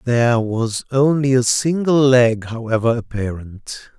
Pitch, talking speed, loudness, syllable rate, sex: 120 Hz, 120 wpm, -17 LUFS, 4.2 syllables/s, male